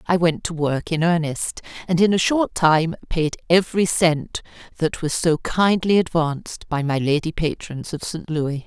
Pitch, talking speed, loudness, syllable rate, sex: 165 Hz, 180 wpm, -21 LUFS, 4.5 syllables/s, female